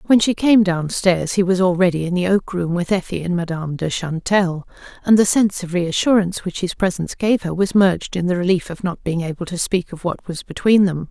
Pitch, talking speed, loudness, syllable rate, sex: 180 Hz, 230 wpm, -19 LUFS, 5.8 syllables/s, female